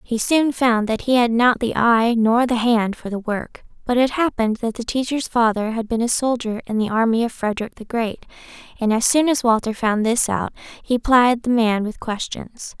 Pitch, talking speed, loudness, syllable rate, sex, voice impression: 230 Hz, 220 wpm, -19 LUFS, 4.9 syllables/s, female, feminine, young, tensed, bright, clear, cute, friendly, sweet, lively